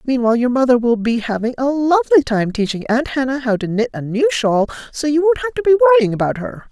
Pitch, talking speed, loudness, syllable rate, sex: 255 Hz, 240 wpm, -16 LUFS, 6.3 syllables/s, female